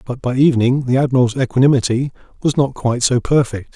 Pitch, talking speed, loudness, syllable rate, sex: 130 Hz, 175 wpm, -16 LUFS, 6.3 syllables/s, male